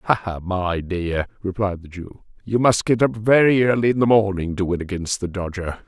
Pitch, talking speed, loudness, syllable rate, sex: 100 Hz, 215 wpm, -20 LUFS, 4.9 syllables/s, male